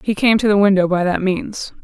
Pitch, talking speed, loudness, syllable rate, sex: 200 Hz, 260 wpm, -16 LUFS, 5.4 syllables/s, female